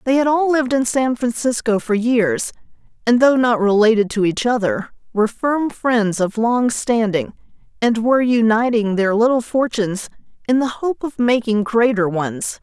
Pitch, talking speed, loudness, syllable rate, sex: 230 Hz, 165 wpm, -17 LUFS, 4.7 syllables/s, female